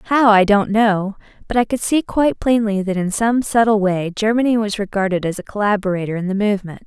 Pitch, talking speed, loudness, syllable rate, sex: 210 Hz, 210 wpm, -17 LUFS, 5.7 syllables/s, female